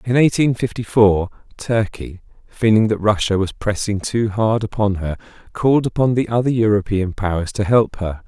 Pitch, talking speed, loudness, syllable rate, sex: 105 Hz, 165 wpm, -18 LUFS, 4.9 syllables/s, male